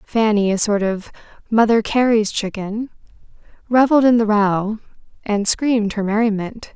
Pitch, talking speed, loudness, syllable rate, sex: 215 Hz, 135 wpm, -18 LUFS, 4.7 syllables/s, female